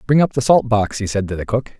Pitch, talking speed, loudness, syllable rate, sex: 115 Hz, 335 wpm, -17 LUFS, 6.1 syllables/s, male